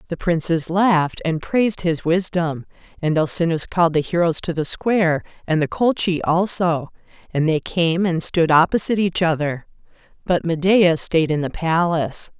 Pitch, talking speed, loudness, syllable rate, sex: 170 Hz, 160 wpm, -19 LUFS, 4.8 syllables/s, female